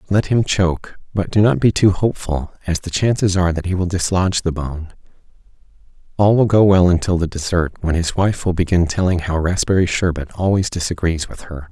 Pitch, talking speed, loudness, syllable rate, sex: 90 Hz, 200 wpm, -17 LUFS, 5.7 syllables/s, male